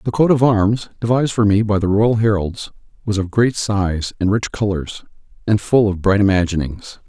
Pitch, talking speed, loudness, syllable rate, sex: 105 Hz, 195 wpm, -17 LUFS, 5.0 syllables/s, male